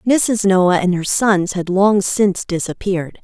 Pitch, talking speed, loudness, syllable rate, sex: 190 Hz, 165 wpm, -16 LUFS, 4.2 syllables/s, female